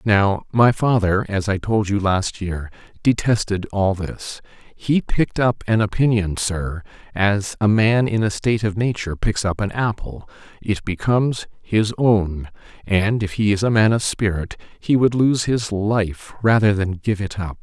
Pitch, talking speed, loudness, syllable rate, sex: 105 Hz, 165 wpm, -20 LUFS, 4.3 syllables/s, male